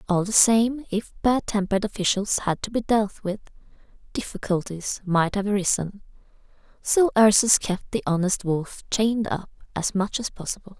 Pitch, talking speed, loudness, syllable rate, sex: 205 Hz, 155 wpm, -23 LUFS, 4.9 syllables/s, female